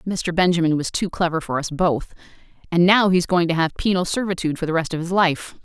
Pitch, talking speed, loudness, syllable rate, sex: 170 Hz, 245 wpm, -20 LUFS, 6.1 syllables/s, female